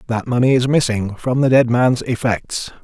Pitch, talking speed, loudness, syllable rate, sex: 120 Hz, 190 wpm, -17 LUFS, 4.7 syllables/s, male